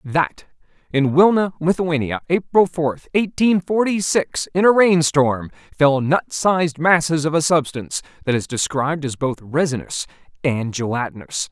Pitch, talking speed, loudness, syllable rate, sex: 155 Hz, 140 wpm, -19 LUFS, 4.5 syllables/s, male